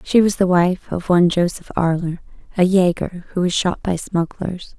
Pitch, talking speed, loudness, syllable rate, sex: 180 Hz, 190 wpm, -19 LUFS, 4.8 syllables/s, female